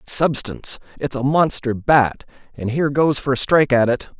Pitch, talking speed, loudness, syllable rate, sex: 135 Hz, 200 wpm, -18 LUFS, 5.3 syllables/s, male